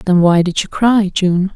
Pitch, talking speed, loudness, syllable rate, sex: 190 Hz, 230 wpm, -14 LUFS, 4.4 syllables/s, female